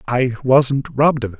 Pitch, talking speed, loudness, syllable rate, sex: 130 Hz, 215 wpm, -16 LUFS, 5.0 syllables/s, male